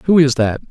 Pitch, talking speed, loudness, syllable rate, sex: 140 Hz, 255 wpm, -14 LUFS, 5.2 syllables/s, male